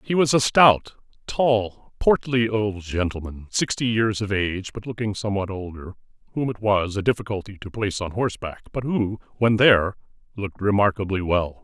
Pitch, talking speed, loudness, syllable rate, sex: 105 Hz, 165 wpm, -22 LUFS, 5.2 syllables/s, male